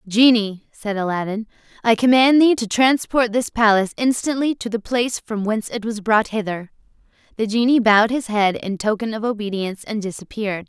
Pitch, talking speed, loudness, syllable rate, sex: 220 Hz, 175 wpm, -19 LUFS, 5.6 syllables/s, female